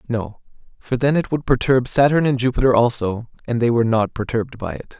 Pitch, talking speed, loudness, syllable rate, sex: 120 Hz, 205 wpm, -19 LUFS, 5.8 syllables/s, male